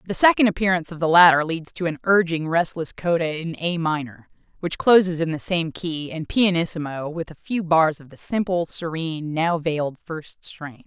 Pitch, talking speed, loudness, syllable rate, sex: 165 Hz, 195 wpm, -21 LUFS, 5.1 syllables/s, female